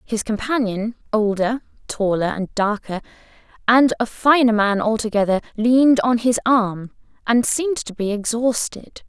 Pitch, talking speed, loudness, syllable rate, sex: 225 Hz, 120 wpm, -19 LUFS, 4.5 syllables/s, female